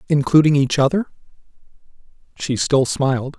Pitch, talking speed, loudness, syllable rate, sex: 140 Hz, 105 wpm, -17 LUFS, 5.1 syllables/s, male